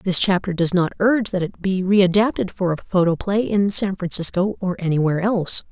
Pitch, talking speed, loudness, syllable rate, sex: 185 Hz, 190 wpm, -19 LUFS, 5.4 syllables/s, female